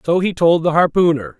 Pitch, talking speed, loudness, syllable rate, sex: 170 Hz, 215 wpm, -15 LUFS, 5.5 syllables/s, male